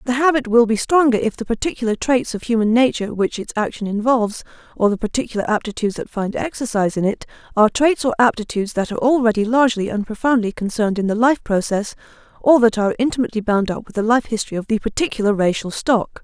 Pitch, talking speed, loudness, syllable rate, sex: 225 Hz, 205 wpm, -18 LUFS, 6.7 syllables/s, female